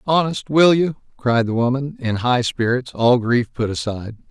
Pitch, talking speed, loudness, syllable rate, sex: 125 Hz, 180 wpm, -19 LUFS, 4.7 syllables/s, male